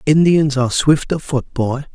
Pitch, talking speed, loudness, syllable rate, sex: 140 Hz, 185 wpm, -16 LUFS, 4.7 syllables/s, male